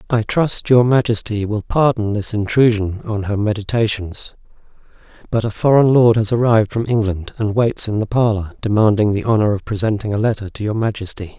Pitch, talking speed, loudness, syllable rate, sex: 110 Hz, 180 wpm, -17 LUFS, 5.5 syllables/s, male